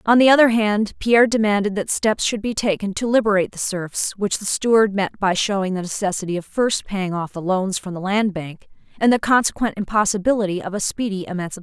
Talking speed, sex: 210 wpm, female